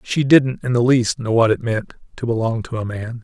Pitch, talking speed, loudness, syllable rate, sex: 120 Hz, 240 wpm, -18 LUFS, 5.2 syllables/s, male